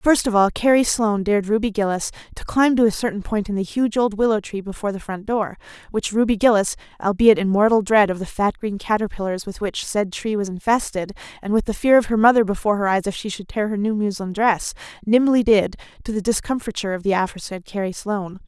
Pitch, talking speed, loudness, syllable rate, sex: 210 Hz, 225 wpm, -20 LUFS, 6.2 syllables/s, female